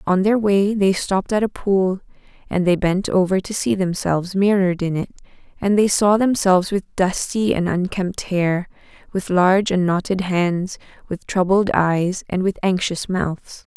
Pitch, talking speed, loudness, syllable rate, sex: 190 Hz, 170 wpm, -19 LUFS, 4.5 syllables/s, female